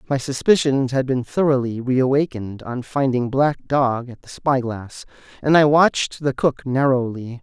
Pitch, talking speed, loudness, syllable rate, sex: 130 Hz, 160 wpm, -19 LUFS, 4.6 syllables/s, male